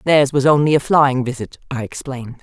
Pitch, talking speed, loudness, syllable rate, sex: 135 Hz, 200 wpm, -17 LUFS, 5.5 syllables/s, female